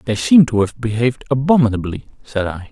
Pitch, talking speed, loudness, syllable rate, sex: 115 Hz, 175 wpm, -16 LUFS, 5.7 syllables/s, male